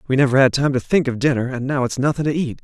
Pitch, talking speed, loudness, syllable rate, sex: 135 Hz, 320 wpm, -18 LUFS, 6.9 syllables/s, male